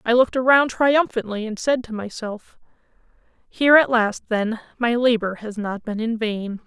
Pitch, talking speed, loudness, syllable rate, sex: 230 Hz, 160 wpm, -20 LUFS, 5.0 syllables/s, female